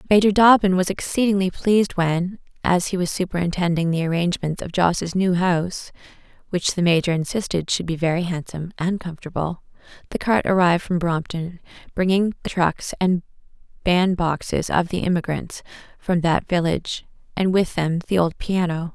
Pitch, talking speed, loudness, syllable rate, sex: 175 Hz, 145 wpm, -21 LUFS, 5.3 syllables/s, female